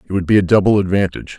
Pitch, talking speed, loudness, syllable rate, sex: 95 Hz, 260 wpm, -15 LUFS, 7.9 syllables/s, male